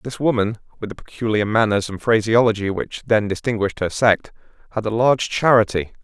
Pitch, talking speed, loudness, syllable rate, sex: 110 Hz, 170 wpm, -19 LUFS, 5.7 syllables/s, male